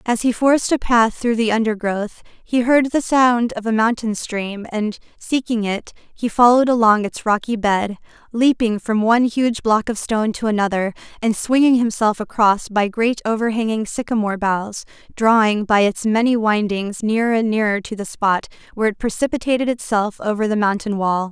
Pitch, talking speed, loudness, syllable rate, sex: 220 Hz, 175 wpm, -18 LUFS, 5.0 syllables/s, female